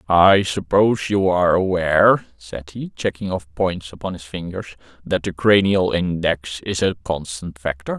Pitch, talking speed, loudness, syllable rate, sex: 90 Hz, 160 wpm, -19 LUFS, 4.6 syllables/s, male